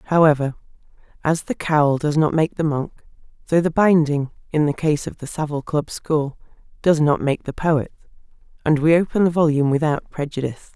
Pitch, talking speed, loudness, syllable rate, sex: 155 Hz, 180 wpm, -20 LUFS, 5.5 syllables/s, female